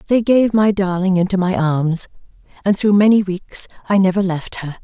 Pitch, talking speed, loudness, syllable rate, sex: 190 Hz, 185 wpm, -16 LUFS, 5.0 syllables/s, female